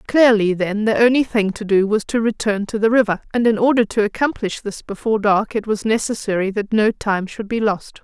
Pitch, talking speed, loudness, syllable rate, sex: 215 Hz, 225 wpm, -18 LUFS, 5.4 syllables/s, female